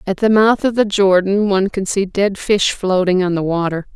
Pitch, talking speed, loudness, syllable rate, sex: 195 Hz, 230 wpm, -15 LUFS, 5.1 syllables/s, female